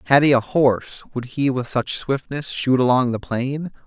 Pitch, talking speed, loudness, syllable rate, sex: 130 Hz, 200 wpm, -20 LUFS, 4.7 syllables/s, male